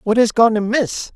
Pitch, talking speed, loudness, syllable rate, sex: 230 Hz, 210 wpm, -16 LUFS, 4.8 syllables/s, female